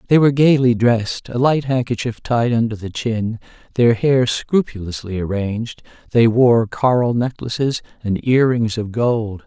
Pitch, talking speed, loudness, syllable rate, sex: 115 Hz, 150 wpm, -18 LUFS, 4.6 syllables/s, male